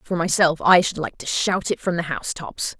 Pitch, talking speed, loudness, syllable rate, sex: 170 Hz, 260 wpm, -21 LUFS, 5.3 syllables/s, female